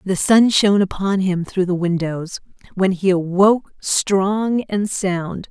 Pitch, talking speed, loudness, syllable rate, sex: 190 Hz, 155 wpm, -18 LUFS, 3.8 syllables/s, female